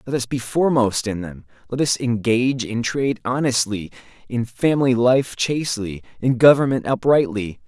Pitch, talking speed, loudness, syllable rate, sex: 120 Hz, 150 wpm, -20 LUFS, 5.1 syllables/s, male